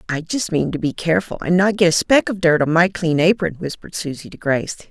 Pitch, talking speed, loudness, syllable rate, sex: 170 Hz, 255 wpm, -18 LUFS, 6.1 syllables/s, female